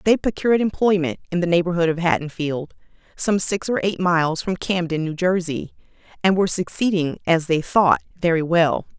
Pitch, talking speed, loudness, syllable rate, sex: 175 Hz, 165 wpm, -20 LUFS, 5.4 syllables/s, female